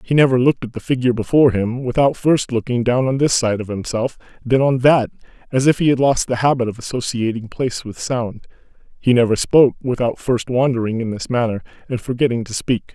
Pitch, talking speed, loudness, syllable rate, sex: 125 Hz, 210 wpm, -18 LUFS, 5.9 syllables/s, male